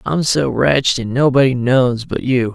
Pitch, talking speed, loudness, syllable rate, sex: 130 Hz, 190 wpm, -15 LUFS, 4.5 syllables/s, male